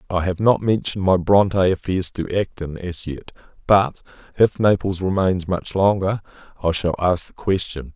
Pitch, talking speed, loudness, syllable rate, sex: 95 Hz, 165 wpm, -20 LUFS, 4.8 syllables/s, male